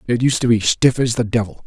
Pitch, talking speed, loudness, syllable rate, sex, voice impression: 115 Hz, 290 wpm, -17 LUFS, 5.9 syllables/s, male, masculine, adult-like, powerful, muffled, fluent, raspy, intellectual, unique, slightly wild, slightly lively, slightly sharp, slightly light